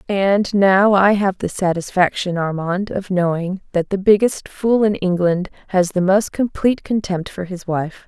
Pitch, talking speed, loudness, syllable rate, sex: 190 Hz, 170 wpm, -18 LUFS, 4.4 syllables/s, female